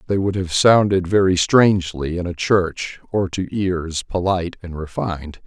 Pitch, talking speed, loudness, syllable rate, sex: 90 Hz, 165 wpm, -19 LUFS, 4.5 syllables/s, male